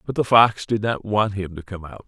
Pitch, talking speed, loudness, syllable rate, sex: 100 Hz, 290 wpm, -20 LUFS, 5.2 syllables/s, male